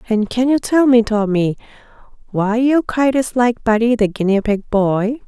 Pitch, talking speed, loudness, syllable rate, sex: 230 Hz, 180 wpm, -16 LUFS, 4.4 syllables/s, female